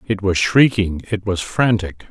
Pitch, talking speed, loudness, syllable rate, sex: 100 Hz, 170 wpm, -18 LUFS, 4.3 syllables/s, male